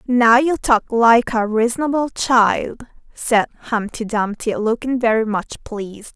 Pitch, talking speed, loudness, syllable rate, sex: 230 Hz, 135 wpm, -17 LUFS, 4.2 syllables/s, female